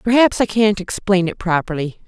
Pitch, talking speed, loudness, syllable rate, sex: 195 Hz, 175 wpm, -17 LUFS, 5.2 syllables/s, female